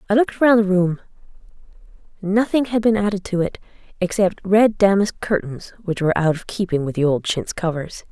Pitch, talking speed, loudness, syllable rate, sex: 190 Hz, 185 wpm, -19 LUFS, 5.5 syllables/s, female